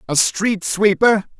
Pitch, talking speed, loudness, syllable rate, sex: 200 Hz, 130 wpm, -16 LUFS, 3.5 syllables/s, male